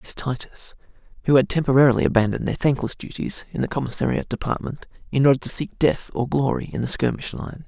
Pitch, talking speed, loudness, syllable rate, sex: 135 Hz, 190 wpm, -22 LUFS, 6.2 syllables/s, male